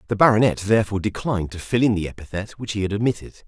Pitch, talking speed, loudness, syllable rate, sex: 105 Hz, 225 wpm, -21 LUFS, 7.6 syllables/s, male